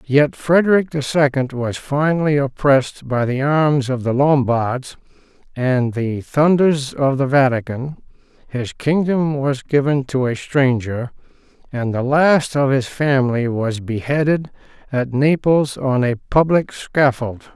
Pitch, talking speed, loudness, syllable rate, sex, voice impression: 135 Hz, 135 wpm, -18 LUFS, 4.0 syllables/s, male, very masculine, slightly old, thick, tensed, weak, bright, soft, muffled, very fluent, slightly raspy, cool, intellectual, slightly refreshing, sincere, calm, mature, friendly, very reassuring, very unique, elegant, very wild, sweet, lively, kind, slightly modest